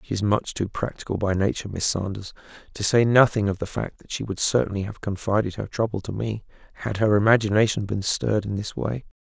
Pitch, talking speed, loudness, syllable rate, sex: 105 Hz, 210 wpm, -24 LUFS, 5.9 syllables/s, male